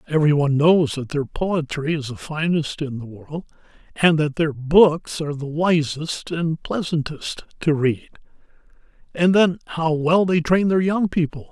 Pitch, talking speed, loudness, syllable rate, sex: 155 Hz, 165 wpm, -20 LUFS, 4.4 syllables/s, male